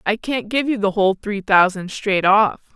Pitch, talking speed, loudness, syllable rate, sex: 205 Hz, 220 wpm, -18 LUFS, 4.8 syllables/s, female